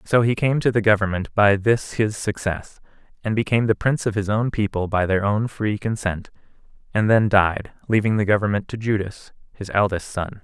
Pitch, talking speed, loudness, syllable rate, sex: 105 Hz, 195 wpm, -21 LUFS, 5.3 syllables/s, male